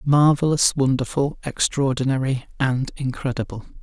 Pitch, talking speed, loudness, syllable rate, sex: 135 Hz, 80 wpm, -21 LUFS, 4.8 syllables/s, male